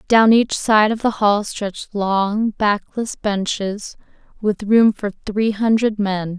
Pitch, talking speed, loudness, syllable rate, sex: 210 Hz, 150 wpm, -18 LUFS, 3.5 syllables/s, female